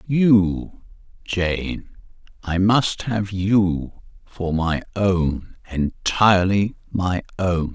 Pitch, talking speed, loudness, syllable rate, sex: 95 Hz, 85 wpm, -21 LUFS, 2.6 syllables/s, male